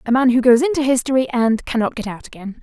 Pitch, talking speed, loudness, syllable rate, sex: 245 Hz, 250 wpm, -17 LUFS, 6.4 syllables/s, female